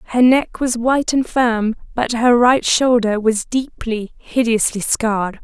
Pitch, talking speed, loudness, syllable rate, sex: 235 Hz, 155 wpm, -17 LUFS, 3.9 syllables/s, female